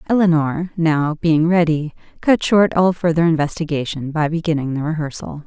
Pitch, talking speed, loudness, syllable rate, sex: 160 Hz, 145 wpm, -18 LUFS, 5.0 syllables/s, female